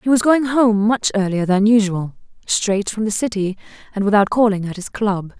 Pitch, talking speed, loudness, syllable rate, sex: 210 Hz, 200 wpm, -17 LUFS, 5.0 syllables/s, female